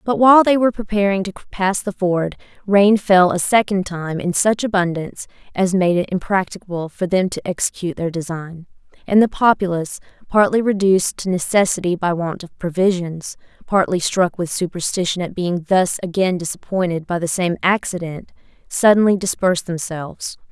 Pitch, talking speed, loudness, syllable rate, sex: 185 Hz, 160 wpm, -18 LUFS, 5.4 syllables/s, female